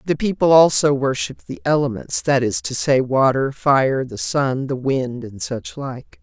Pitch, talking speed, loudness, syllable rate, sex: 135 Hz, 175 wpm, -19 LUFS, 4.3 syllables/s, female